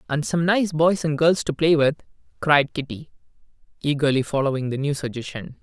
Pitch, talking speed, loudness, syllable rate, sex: 150 Hz, 170 wpm, -22 LUFS, 5.3 syllables/s, male